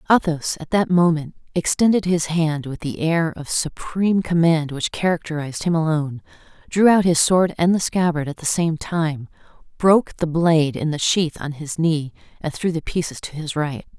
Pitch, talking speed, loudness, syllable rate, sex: 160 Hz, 190 wpm, -20 LUFS, 5.0 syllables/s, female